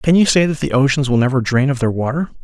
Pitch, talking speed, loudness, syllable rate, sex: 135 Hz, 295 wpm, -16 LUFS, 6.5 syllables/s, male